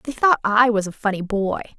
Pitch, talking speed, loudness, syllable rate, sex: 220 Hz, 235 wpm, -20 LUFS, 5.5 syllables/s, female